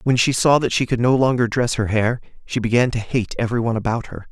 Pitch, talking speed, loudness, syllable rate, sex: 120 Hz, 265 wpm, -19 LUFS, 6.4 syllables/s, male